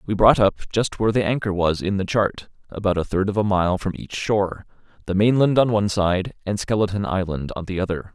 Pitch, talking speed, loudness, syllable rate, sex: 100 Hz, 230 wpm, -21 LUFS, 5.7 syllables/s, male